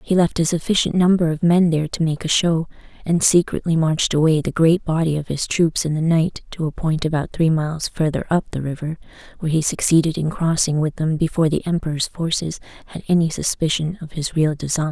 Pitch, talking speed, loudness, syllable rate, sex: 160 Hz, 215 wpm, -19 LUFS, 5.8 syllables/s, female